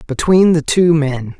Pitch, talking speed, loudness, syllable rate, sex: 155 Hz, 170 wpm, -13 LUFS, 4.1 syllables/s, male